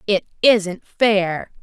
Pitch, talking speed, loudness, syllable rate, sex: 200 Hz, 110 wpm, -18 LUFS, 2.9 syllables/s, female